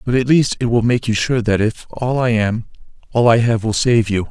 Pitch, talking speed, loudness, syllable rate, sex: 115 Hz, 265 wpm, -16 LUFS, 5.1 syllables/s, male